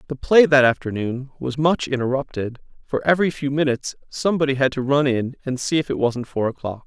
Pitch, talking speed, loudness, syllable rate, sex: 135 Hz, 200 wpm, -21 LUFS, 5.8 syllables/s, male